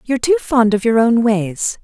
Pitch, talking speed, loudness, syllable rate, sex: 230 Hz, 230 wpm, -15 LUFS, 4.8 syllables/s, female